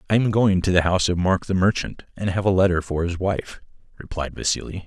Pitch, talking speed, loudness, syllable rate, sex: 95 Hz, 235 wpm, -21 LUFS, 5.9 syllables/s, male